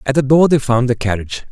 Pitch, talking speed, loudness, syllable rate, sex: 130 Hz, 275 wpm, -15 LUFS, 6.8 syllables/s, male